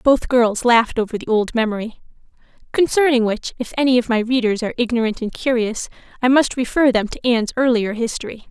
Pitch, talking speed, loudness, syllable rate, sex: 235 Hz, 185 wpm, -18 LUFS, 6.1 syllables/s, female